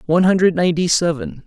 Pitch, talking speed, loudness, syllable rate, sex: 170 Hz, 165 wpm, -16 LUFS, 6.8 syllables/s, male